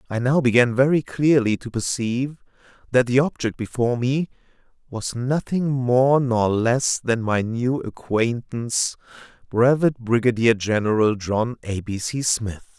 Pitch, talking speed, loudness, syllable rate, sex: 120 Hz, 135 wpm, -21 LUFS, 4.3 syllables/s, male